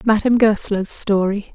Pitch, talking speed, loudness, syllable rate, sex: 210 Hz, 115 wpm, -17 LUFS, 4.8 syllables/s, female